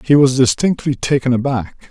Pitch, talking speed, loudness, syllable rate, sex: 130 Hz, 155 wpm, -15 LUFS, 5.0 syllables/s, male